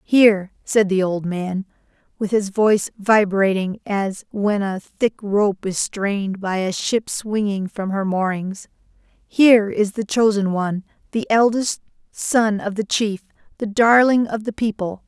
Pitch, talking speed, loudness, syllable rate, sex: 205 Hz, 155 wpm, -20 LUFS, 4.2 syllables/s, female